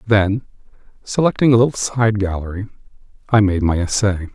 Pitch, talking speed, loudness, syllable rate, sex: 105 Hz, 140 wpm, -17 LUFS, 5.3 syllables/s, male